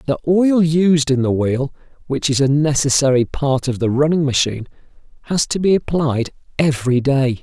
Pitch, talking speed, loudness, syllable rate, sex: 140 Hz, 170 wpm, -17 LUFS, 5.0 syllables/s, male